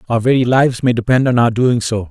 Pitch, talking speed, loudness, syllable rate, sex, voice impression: 120 Hz, 255 wpm, -14 LUFS, 6.2 syllables/s, male, very masculine, slightly young, adult-like, thick, slightly tensed, weak, slightly dark, slightly soft, clear, fluent, slightly raspy, cool, intellectual, slightly refreshing, sincere, very calm, friendly, slightly reassuring, unique, slightly elegant, slightly wild, slightly lively, kind, modest